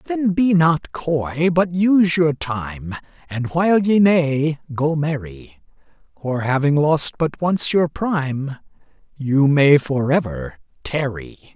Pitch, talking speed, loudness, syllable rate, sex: 155 Hz, 135 wpm, -18 LUFS, 3.5 syllables/s, male